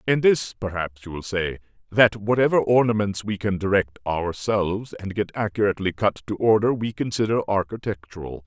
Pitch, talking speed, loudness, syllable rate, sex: 105 Hz, 155 wpm, -23 LUFS, 5.2 syllables/s, male